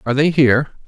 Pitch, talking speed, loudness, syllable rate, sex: 135 Hz, 205 wpm, -15 LUFS, 8.2 syllables/s, male